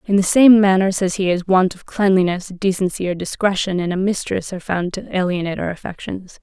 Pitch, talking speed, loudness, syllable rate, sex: 185 Hz, 205 wpm, -18 LUFS, 5.9 syllables/s, female